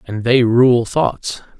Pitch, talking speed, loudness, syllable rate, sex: 120 Hz, 150 wpm, -14 LUFS, 3.0 syllables/s, male